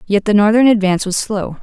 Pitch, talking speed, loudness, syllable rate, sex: 205 Hz, 220 wpm, -14 LUFS, 6.1 syllables/s, female